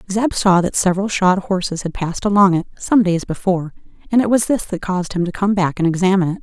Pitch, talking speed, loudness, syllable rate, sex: 190 Hz, 245 wpm, -17 LUFS, 6.5 syllables/s, female